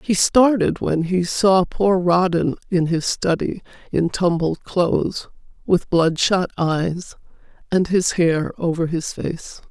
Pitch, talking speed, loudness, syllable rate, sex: 175 Hz, 140 wpm, -19 LUFS, 3.6 syllables/s, female